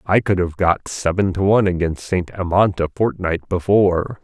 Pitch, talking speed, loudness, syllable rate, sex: 90 Hz, 185 wpm, -18 LUFS, 5.0 syllables/s, male